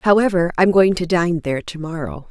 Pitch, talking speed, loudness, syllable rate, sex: 175 Hz, 210 wpm, -18 LUFS, 5.5 syllables/s, female